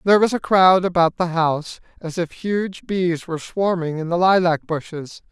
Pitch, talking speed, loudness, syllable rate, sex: 175 Hz, 190 wpm, -19 LUFS, 4.8 syllables/s, male